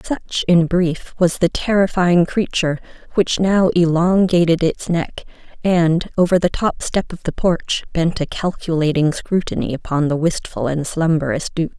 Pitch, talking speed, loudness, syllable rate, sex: 170 Hz, 155 wpm, -18 LUFS, 4.5 syllables/s, female